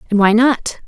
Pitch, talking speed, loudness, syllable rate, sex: 225 Hz, 205 wpm, -14 LUFS, 5.1 syllables/s, female